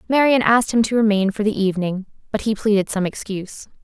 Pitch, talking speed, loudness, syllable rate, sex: 210 Hz, 205 wpm, -19 LUFS, 6.4 syllables/s, female